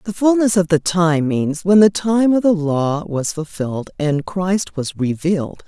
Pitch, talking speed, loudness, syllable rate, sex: 175 Hz, 190 wpm, -17 LUFS, 4.2 syllables/s, female